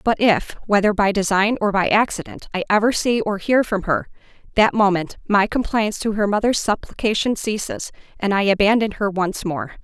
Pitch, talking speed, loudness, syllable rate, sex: 205 Hz, 185 wpm, -19 LUFS, 5.2 syllables/s, female